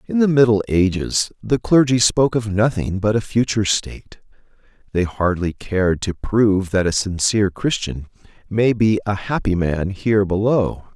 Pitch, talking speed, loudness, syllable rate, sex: 105 Hz, 160 wpm, -18 LUFS, 4.9 syllables/s, male